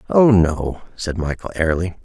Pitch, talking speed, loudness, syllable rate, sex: 90 Hz, 145 wpm, -19 LUFS, 4.9 syllables/s, male